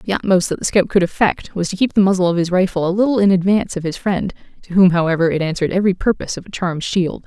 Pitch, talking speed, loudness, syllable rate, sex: 185 Hz, 270 wpm, -17 LUFS, 7.1 syllables/s, female